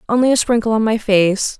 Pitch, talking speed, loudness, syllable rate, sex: 220 Hz, 225 wpm, -15 LUFS, 5.7 syllables/s, female